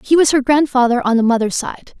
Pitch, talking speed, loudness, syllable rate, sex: 260 Hz, 240 wpm, -15 LUFS, 5.9 syllables/s, female